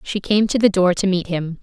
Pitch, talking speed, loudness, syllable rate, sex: 190 Hz, 295 wpm, -18 LUFS, 5.2 syllables/s, female